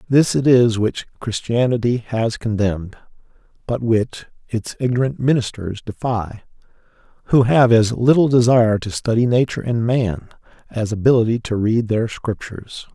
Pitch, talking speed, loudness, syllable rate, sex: 115 Hz, 135 wpm, -18 LUFS, 4.8 syllables/s, male